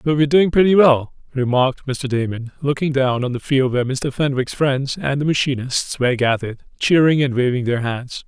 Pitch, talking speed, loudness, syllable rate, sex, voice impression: 135 Hz, 205 wpm, -18 LUFS, 5.7 syllables/s, male, masculine, adult-like, intellectual, slightly sincere, slightly calm